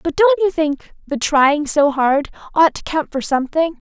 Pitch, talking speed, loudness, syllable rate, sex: 305 Hz, 195 wpm, -17 LUFS, 4.4 syllables/s, female